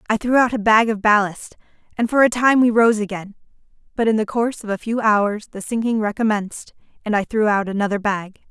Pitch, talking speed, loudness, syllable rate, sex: 215 Hz, 220 wpm, -19 LUFS, 5.8 syllables/s, female